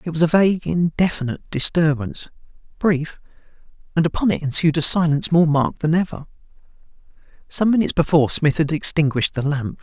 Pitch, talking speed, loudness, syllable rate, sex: 160 Hz, 155 wpm, -19 LUFS, 6.3 syllables/s, male